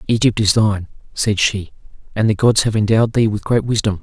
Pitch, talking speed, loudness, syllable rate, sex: 110 Hz, 210 wpm, -16 LUFS, 5.9 syllables/s, male